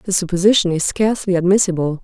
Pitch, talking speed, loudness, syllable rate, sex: 185 Hz, 145 wpm, -16 LUFS, 6.5 syllables/s, female